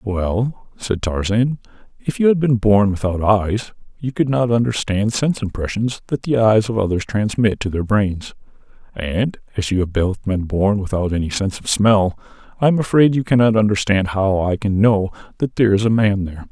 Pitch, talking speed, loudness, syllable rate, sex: 105 Hz, 195 wpm, -18 LUFS, 5.0 syllables/s, male